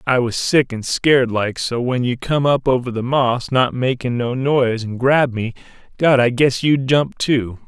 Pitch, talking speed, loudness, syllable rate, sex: 125 Hz, 195 wpm, -17 LUFS, 4.5 syllables/s, male